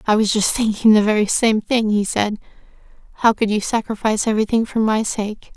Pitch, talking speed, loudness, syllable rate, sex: 215 Hz, 195 wpm, -18 LUFS, 5.7 syllables/s, female